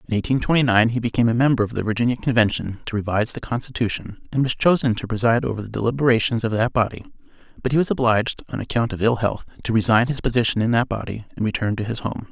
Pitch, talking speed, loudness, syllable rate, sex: 115 Hz, 235 wpm, -21 LUFS, 7.1 syllables/s, male